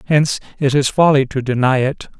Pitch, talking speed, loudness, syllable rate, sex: 135 Hz, 190 wpm, -16 LUFS, 5.8 syllables/s, male